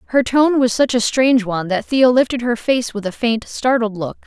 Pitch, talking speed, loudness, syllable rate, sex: 235 Hz, 240 wpm, -17 LUFS, 5.3 syllables/s, female